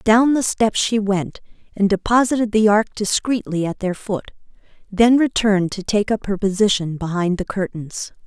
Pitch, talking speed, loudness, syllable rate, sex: 205 Hz, 165 wpm, -19 LUFS, 4.8 syllables/s, female